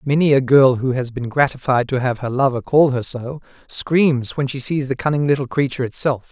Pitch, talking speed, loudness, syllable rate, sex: 135 Hz, 220 wpm, -18 LUFS, 5.4 syllables/s, male